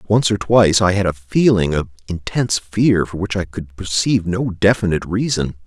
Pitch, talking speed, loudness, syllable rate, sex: 95 Hz, 190 wpm, -17 LUFS, 5.3 syllables/s, male